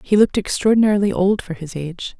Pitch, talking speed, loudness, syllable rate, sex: 195 Hz, 190 wpm, -18 LUFS, 6.7 syllables/s, female